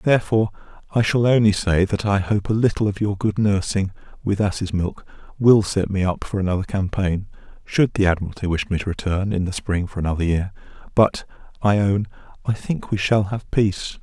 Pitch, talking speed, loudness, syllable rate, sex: 100 Hz, 195 wpm, -21 LUFS, 5.5 syllables/s, male